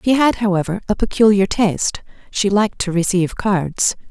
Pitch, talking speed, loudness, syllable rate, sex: 200 Hz, 160 wpm, -17 LUFS, 5.3 syllables/s, female